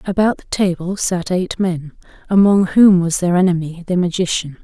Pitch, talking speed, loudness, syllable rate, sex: 180 Hz, 170 wpm, -16 LUFS, 4.9 syllables/s, female